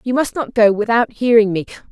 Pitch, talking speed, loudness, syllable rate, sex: 225 Hz, 220 wpm, -16 LUFS, 5.8 syllables/s, female